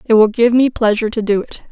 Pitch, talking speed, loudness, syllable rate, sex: 225 Hz, 280 wpm, -14 LUFS, 6.5 syllables/s, female